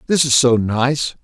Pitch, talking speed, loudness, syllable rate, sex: 130 Hz, 195 wpm, -15 LUFS, 3.9 syllables/s, male